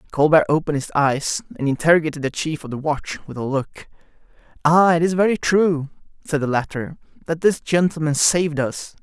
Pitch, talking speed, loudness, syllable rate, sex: 155 Hz, 175 wpm, -20 LUFS, 5.7 syllables/s, male